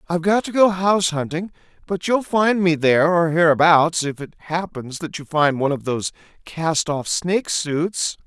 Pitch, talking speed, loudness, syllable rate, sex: 165 Hz, 190 wpm, -19 LUFS, 5.0 syllables/s, male